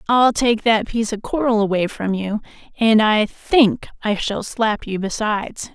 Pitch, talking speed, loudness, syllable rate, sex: 220 Hz, 180 wpm, -19 LUFS, 4.4 syllables/s, female